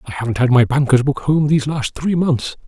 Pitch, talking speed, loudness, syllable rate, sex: 140 Hz, 245 wpm, -16 LUFS, 5.6 syllables/s, male